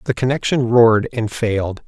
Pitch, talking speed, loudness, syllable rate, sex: 115 Hz, 160 wpm, -17 LUFS, 5.3 syllables/s, male